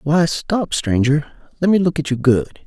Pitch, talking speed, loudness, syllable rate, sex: 150 Hz, 200 wpm, -18 LUFS, 4.6 syllables/s, male